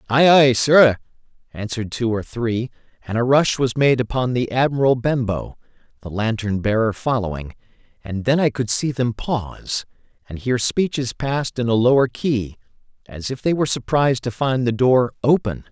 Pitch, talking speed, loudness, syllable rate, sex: 120 Hz, 170 wpm, -19 LUFS, 5.0 syllables/s, male